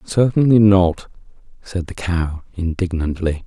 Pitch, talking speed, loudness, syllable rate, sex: 90 Hz, 105 wpm, -18 LUFS, 3.9 syllables/s, male